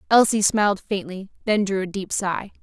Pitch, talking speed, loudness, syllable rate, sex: 200 Hz, 185 wpm, -22 LUFS, 5.1 syllables/s, female